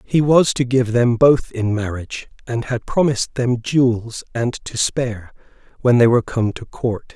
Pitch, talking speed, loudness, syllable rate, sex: 120 Hz, 185 wpm, -18 LUFS, 4.6 syllables/s, male